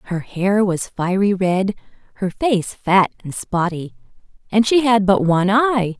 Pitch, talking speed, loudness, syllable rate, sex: 195 Hz, 160 wpm, -18 LUFS, 4.3 syllables/s, female